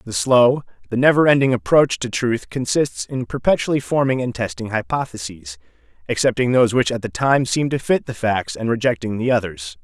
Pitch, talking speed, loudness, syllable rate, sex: 115 Hz, 185 wpm, -19 LUFS, 5.4 syllables/s, male